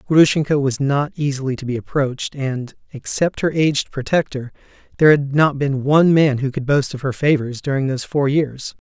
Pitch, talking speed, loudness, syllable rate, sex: 140 Hz, 190 wpm, -18 LUFS, 5.4 syllables/s, male